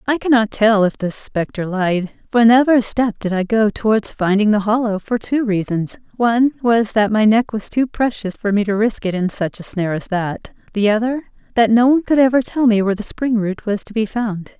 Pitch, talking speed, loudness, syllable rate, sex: 220 Hz, 230 wpm, -17 LUFS, 5.3 syllables/s, female